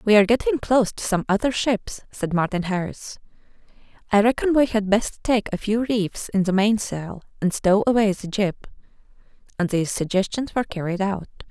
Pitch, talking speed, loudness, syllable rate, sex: 205 Hz, 175 wpm, -22 LUFS, 5.4 syllables/s, female